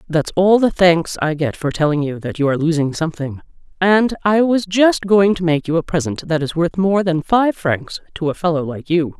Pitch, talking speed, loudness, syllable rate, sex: 170 Hz, 235 wpm, -17 LUFS, 5.1 syllables/s, female